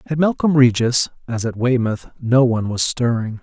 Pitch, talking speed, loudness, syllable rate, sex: 125 Hz, 175 wpm, -18 LUFS, 5.3 syllables/s, male